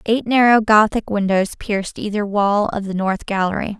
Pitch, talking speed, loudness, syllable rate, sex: 205 Hz, 175 wpm, -18 LUFS, 5.0 syllables/s, female